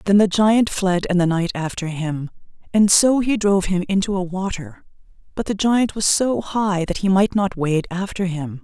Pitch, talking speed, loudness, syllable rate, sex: 190 Hz, 210 wpm, -19 LUFS, 4.7 syllables/s, female